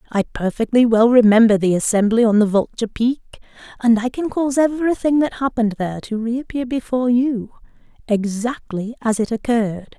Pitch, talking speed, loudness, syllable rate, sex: 230 Hz, 155 wpm, -18 LUFS, 5.5 syllables/s, female